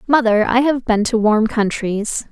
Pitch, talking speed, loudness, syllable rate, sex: 230 Hz, 180 wpm, -16 LUFS, 4.2 syllables/s, female